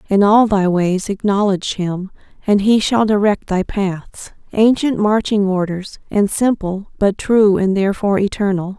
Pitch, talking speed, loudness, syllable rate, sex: 200 Hz, 150 wpm, -16 LUFS, 4.5 syllables/s, female